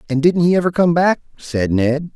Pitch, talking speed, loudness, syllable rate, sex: 155 Hz, 225 wpm, -16 LUFS, 5.0 syllables/s, male